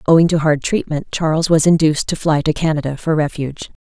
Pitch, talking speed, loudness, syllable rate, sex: 155 Hz, 205 wpm, -16 LUFS, 6.2 syllables/s, female